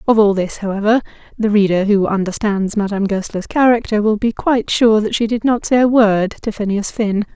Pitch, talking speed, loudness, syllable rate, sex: 210 Hz, 205 wpm, -16 LUFS, 5.5 syllables/s, female